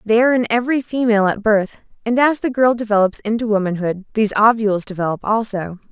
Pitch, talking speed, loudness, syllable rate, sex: 220 Hz, 185 wpm, -17 LUFS, 6.4 syllables/s, female